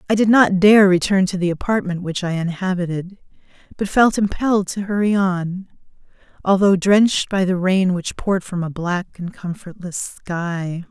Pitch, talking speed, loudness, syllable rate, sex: 185 Hz, 165 wpm, -18 LUFS, 4.7 syllables/s, female